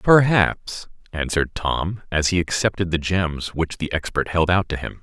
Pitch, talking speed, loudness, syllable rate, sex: 90 Hz, 180 wpm, -21 LUFS, 4.6 syllables/s, male